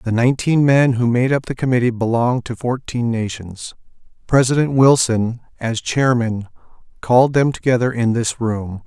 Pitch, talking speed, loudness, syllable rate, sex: 120 Hz, 150 wpm, -17 LUFS, 5.0 syllables/s, male